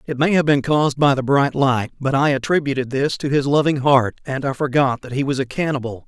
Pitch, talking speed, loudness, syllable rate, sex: 140 Hz, 245 wpm, -19 LUFS, 5.7 syllables/s, male